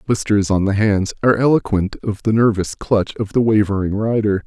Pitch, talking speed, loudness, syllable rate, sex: 105 Hz, 190 wpm, -17 LUFS, 5.2 syllables/s, male